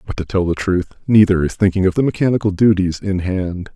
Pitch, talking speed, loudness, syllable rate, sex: 95 Hz, 225 wpm, -17 LUFS, 5.9 syllables/s, male